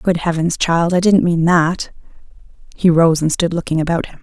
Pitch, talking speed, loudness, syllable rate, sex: 170 Hz, 200 wpm, -15 LUFS, 5.1 syllables/s, female